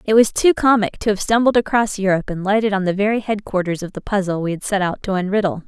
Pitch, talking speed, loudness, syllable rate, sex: 200 Hz, 255 wpm, -18 LUFS, 6.5 syllables/s, female